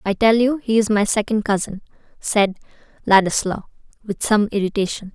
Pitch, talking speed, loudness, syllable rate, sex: 210 Hz, 150 wpm, -19 LUFS, 5.4 syllables/s, female